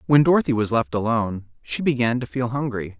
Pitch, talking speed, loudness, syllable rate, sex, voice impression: 120 Hz, 200 wpm, -22 LUFS, 5.9 syllables/s, male, masculine, adult-like, tensed, powerful, slightly bright, clear, slightly halting, intellectual, friendly, reassuring, wild, lively, kind